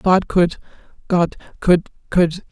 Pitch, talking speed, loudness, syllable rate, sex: 175 Hz, 70 wpm, -18 LUFS, 3.3 syllables/s, female